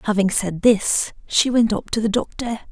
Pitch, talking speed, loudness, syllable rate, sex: 215 Hz, 200 wpm, -19 LUFS, 4.7 syllables/s, female